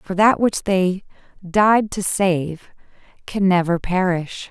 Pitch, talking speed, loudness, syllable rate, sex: 190 Hz, 135 wpm, -19 LUFS, 3.4 syllables/s, female